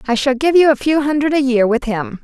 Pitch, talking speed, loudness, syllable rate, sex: 270 Hz, 295 wpm, -15 LUFS, 5.8 syllables/s, female